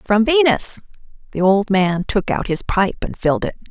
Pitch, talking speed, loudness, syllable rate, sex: 205 Hz, 195 wpm, -18 LUFS, 4.9 syllables/s, female